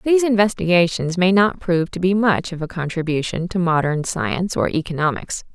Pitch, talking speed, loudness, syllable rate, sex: 180 Hz, 175 wpm, -19 LUFS, 5.6 syllables/s, female